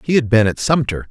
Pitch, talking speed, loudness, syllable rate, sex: 120 Hz, 270 wpm, -16 LUFS, 5.9 syllables/s, male